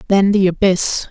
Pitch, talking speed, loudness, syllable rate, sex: 190 Hz, 165 wpm, -14 LUFS, 4.4 syllables/s, female